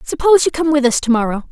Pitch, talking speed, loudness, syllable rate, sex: 275 Hz, 240 wpm, -14 LUFS, 7.4 syllables/s, female